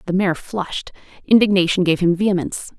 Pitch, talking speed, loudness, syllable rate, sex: 185 Hz, 150 wpm, -18 LUFS, 6.2 syllables/s, female